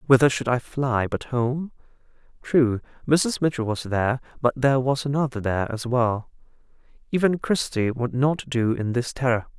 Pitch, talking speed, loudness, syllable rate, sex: 130 Hz, 165 wpm, -23 LUFS, 4.9 syllables/s, male